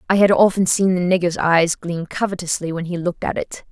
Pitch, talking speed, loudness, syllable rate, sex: 175 Hz, 225 wpm, -18 LUFS, 5.8 syllables/s, female